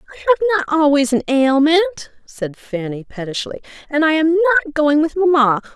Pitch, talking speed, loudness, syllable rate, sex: 290 Hz, 165 wpm, -16 LUFS, 6.1 syllables/s, female